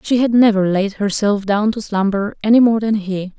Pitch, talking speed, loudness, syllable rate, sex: 210 Hz, 215 wpm, -16 LUFS, 5.1 syllables/s, female